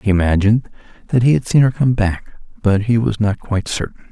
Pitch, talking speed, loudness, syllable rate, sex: 110 Hz, 220 wpm, -17 LUFS, 6.2 syllables/s, male